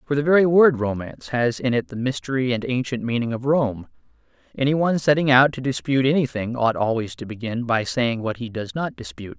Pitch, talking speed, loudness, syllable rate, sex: 125 Hz, 210 wpm, -21 LUFS, 5.9 syllables/s, male